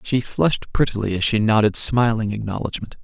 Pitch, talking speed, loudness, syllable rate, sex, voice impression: 110 Hz, 160 wpm, -20 LUFS, 5.8 syllables/s, male, very masculine, slightly young, very adult-like, thick, tensed, powerful, very bright, slightly soft, very clear, very fluent, cool, very intellectual, very refreshing, very sincere, slightly calm, friendly, very reassuring, very unique, elegant, slightly wild, slightly sweet, very lively, very kind, intense, slightly modest, light